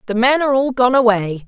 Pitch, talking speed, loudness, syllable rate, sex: 245 Hz, 245 wpm, -15 LUFS, 6.1 syllables/s, female